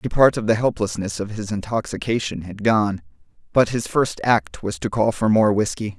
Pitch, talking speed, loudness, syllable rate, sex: 105 Hz, 200 wpm, -21 LUFS, 5.0 syllables/s, male